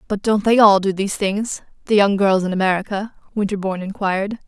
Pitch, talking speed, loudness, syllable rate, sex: 200 Hz, 175 wpm, -18 LUFS, 6.1 syllables/s, female